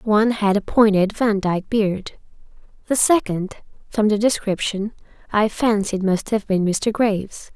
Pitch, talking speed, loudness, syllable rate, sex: 205 Hz, 145 wpm, -20 LUFS, 4.4 syllables/s, female